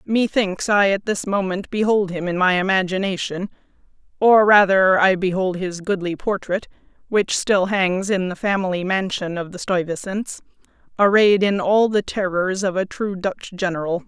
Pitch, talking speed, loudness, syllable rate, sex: 190 Hz, 160 wpm, -19 LUFS, 4.7 syllables/s, female